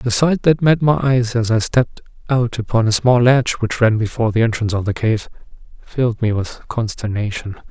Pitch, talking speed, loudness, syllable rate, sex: 115 Hz, 200 wpm, -17 LUFS, 5.4 syllables/s, male